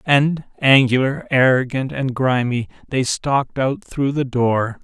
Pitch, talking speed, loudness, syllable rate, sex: 130 Hz, 135 wpm, -18 LUFS, 3.9 syllables/s, male